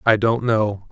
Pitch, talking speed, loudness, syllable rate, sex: 110 Hz, 200 wpm, -19 LUFS, 3.9 syllables/s, male